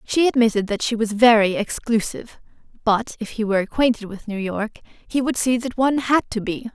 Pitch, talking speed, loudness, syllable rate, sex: 225 Hz, 205 wpm, -20 LUFS, 5.5 syllables/s, female